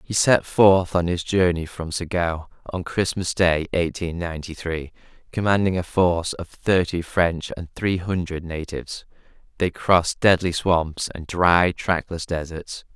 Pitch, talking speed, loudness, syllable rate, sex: 85 Hz, 150 wpm, -22 LUFS, 4.2 syllables/s, male